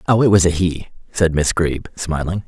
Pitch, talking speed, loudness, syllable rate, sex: 85 Hz, 220 wpm, -18 LUFS, 4.9 syllables/s, male